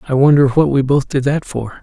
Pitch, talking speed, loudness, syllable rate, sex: 140 Hz, 265 wpm, -14 LUFS, 5.5 syllables/s, male